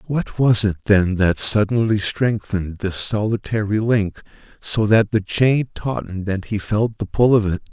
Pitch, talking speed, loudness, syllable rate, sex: 105 Hz, 170 wpm, -19 LUFS, 4.5 syllables/s, male